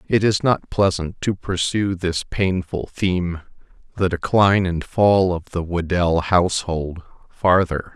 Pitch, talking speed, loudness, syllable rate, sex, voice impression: 90 Hz, 120 wpm, -20 LUFS, 4.0 syllables/s, male, masculine, adult-like, thick, tensed, slightly powerful, clear, halting, calm, mature, friendly, reassuring, wild, kind, slightly modest